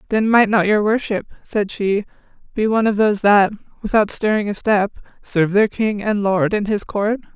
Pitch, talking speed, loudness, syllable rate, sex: 210 Hz, 195 wpm, -18 LUFS, 5.2 syllables/s, female